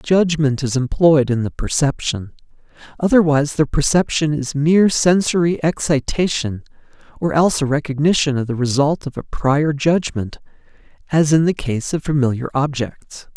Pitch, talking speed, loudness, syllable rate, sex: 145 Hz, 140 wpm, -17 LUFS, 4.9 syllables/s, male